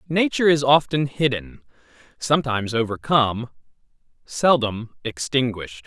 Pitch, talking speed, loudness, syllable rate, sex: 125 Hz, 80 wpm, -21 LUFS, 5.0 syllables/s, male